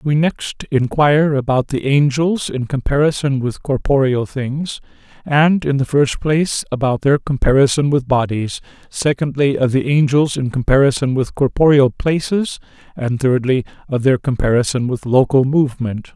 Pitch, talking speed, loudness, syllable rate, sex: 135 Hz, 140 wpm, -16 LUFS, 4.7 syllables/s, male